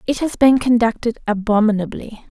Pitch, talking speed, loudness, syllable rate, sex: 230 Hz, 125 wpm, -17 LUFS, 5.3 syllables/s, female